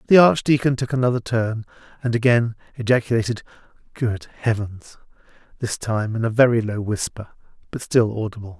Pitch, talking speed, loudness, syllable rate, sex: 115 Hz, 140 wpm, -21 LUFS, 5.5 syllables/s, male